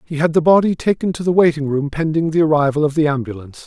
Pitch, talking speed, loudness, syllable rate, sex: 155 Hz, 245 wpm, -16 LUFS, 6.8 syllables/s, male